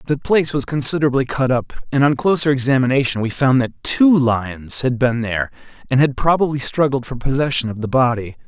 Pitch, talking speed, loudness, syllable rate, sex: 130 Hz, 190 wpm, -17 LUFS, 5.7 syllables/s, male